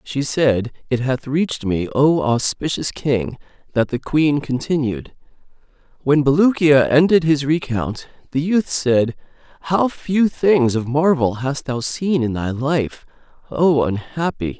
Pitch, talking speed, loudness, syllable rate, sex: 140 Hz, 140 wpm, -18 LUFS, 3.9 syllables/s, male